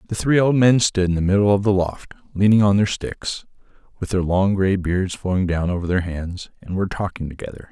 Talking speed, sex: 250 wpm, male